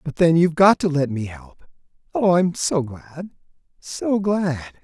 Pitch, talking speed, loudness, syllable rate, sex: 160 Hz, 160 wpm, -19 LUFS, 4.2 syllables/s, male